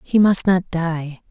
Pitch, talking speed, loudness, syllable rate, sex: 175 Hz, 185 wpm, -18 LUFS, 3.5 syllables/s, female